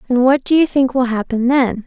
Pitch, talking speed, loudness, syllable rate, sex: 255 Hz, 260 wpm, -15 LUFS, 5.3 syllables/s, female